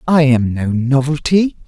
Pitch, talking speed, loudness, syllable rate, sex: 140 Hz, 145 wpm, -15 LUFS, 4.1 syllables/s, male